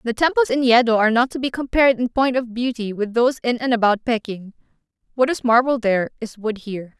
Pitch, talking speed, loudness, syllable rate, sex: 240 Hz, 225 wpm, -19 LUFS, 6.2 syllables/s, female